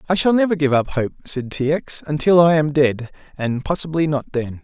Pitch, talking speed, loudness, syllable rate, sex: 150 Hz, 220 wpm, -19 LUFS, 5.2 syllables/s, male